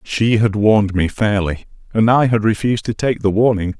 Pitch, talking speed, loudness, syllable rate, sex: 105 Hz, 205 wpm, -16 LUFS, 5.3 syllables/s, male